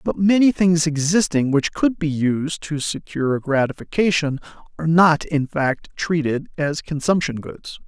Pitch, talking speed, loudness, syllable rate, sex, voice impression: 155 Hz, 150 wpm, -20 LUFS, 4.6 syllables/s, male, masculine, very adult-like, slightly muffled, fluent, slightly refreshing, sincere, slightly elegant